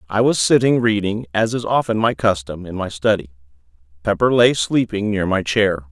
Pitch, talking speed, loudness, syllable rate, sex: 100 Hz, 185 wpm, -18 LUFS, 5.2 syllables/s, male